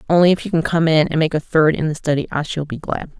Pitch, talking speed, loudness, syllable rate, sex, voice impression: 160 Hz, 320 wpm, -18 LUFS, 6.5 syllables/s, female, feminine, middle-aged, tensed, clear, fluent, calm, reassuring, slightly elegant, slightly strict, sharp